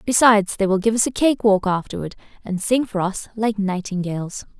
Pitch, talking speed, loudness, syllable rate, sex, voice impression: 205 Hz, 195 wpm, -20 LUFS, 5.5 syllables/s, female, very feminine, very young, very thin, slightly tensed, powerful, very bright, slightly soft, very clear, very fluent, very cute, intellectual, very refreshing, sincere, calm, very friendly, very reassuring, very unique, elegant, slightly wild, very sweet, lively, kind, slightly intense, slightly sharp